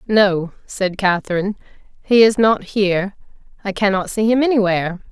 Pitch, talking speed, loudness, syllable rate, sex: 200 Hz, 140 wpm, -17 LUFS, 5.2 syllables/s, female